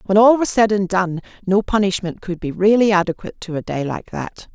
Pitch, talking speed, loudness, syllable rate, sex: 195 Hz, 225 wpm, -18 LUFS, 5.6 syllables/s, female